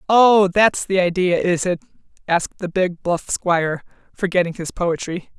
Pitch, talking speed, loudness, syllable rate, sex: 180 Hz, 165 wpm, -19 LUFS, 4.5 syllables/s, female